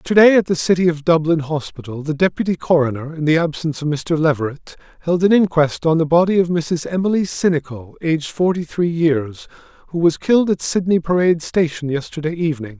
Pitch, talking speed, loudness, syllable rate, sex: 160 Hz, 185 wpm, -18 LUFS, 5.3 syllables/s, male